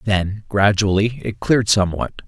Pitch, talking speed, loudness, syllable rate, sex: 105 Hz, 130 wpm, -18 LUFS, 5.2 syllables/s, male